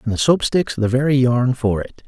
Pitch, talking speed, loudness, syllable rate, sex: 125 Hz, 260 wpm, -18 LUFS, 5.1 syllables/s, male